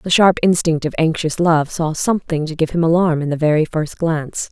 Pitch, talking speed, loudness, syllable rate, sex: 160 Hz, 225 wpm, -17 LUFS, 5.4 syllables/s, female